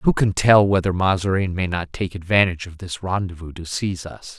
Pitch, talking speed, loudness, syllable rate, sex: 95 Hz, 205 wpm, -20 LUFS, 5.5 syllables/s, male